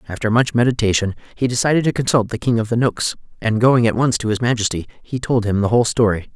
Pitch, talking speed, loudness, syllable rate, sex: 115 Hz, 235 wpm, -18 LUFS, 6.4 syllables/s, male